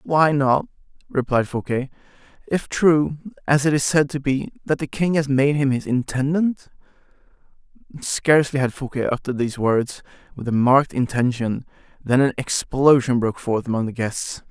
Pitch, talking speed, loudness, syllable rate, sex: 135 Hz, 155 wpm, -21 LUFS, 5.0 syllables/s, male